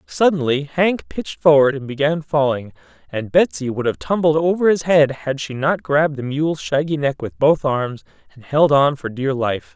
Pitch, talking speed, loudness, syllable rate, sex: 140 Hz, 195 wpm, -18 LUFS, 4.9 syllables/s, male